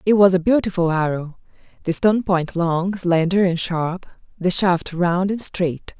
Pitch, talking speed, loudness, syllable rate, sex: 180 Hz, 170 wpm, -19 LUFS, 4.4 syllables/s, female